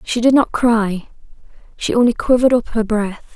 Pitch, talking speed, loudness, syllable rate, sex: 230 Hz, 160 wpm, -16 LUFS, 5.0 syllables/s, female